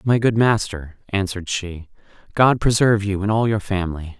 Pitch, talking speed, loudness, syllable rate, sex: 100 Hz, 170 wpm, -19 LUFS, 5.4 syllables/s, male